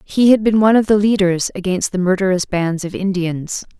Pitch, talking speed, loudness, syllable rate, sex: 190 Hz, 205 wpm, -16 LUFS, 5.4 syllables/s, female